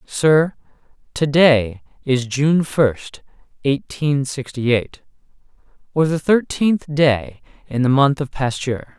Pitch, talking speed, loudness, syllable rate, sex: 135 Hz, 115 wpm, -18 LUFS, 3.5 syllables/s, male